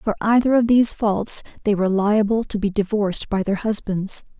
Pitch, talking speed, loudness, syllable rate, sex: 210 Hz, 190 wpm, -20 LUFS, 5.3 syllables/s, female